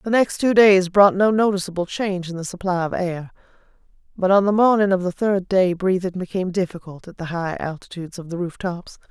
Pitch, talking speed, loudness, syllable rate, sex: 185 Hz, 205 wpm, -20 LUFS, 5.9 syllables/s, female